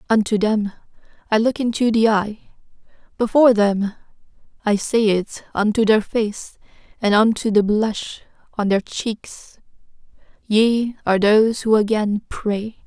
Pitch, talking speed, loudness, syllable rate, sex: 215 Hz, 125 wpm, -19 LUFS, 4.1 syllables/s, female